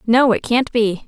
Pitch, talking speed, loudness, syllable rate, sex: 235 Hz, 220 wpm, -17 LUFS, 4.2 syllables/s, female